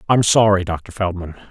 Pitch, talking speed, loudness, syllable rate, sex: 95 Hz, 160 wpm, -17 LUFS, 5.0 syllables/s, male